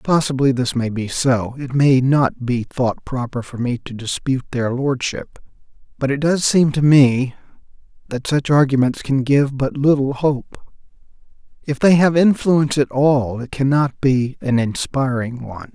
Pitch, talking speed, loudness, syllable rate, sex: 135 Hz, 165 wpm, -18 LUFS, 4.4 syllables/s, male